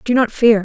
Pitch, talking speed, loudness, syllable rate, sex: 230 Hz, 280 wpm, -15 LUFS, 5.2 syllables/s, female